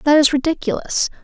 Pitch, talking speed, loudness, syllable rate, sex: 280 Hz, 145 wpm, -17 LUFS, 5.6 syllables/s, female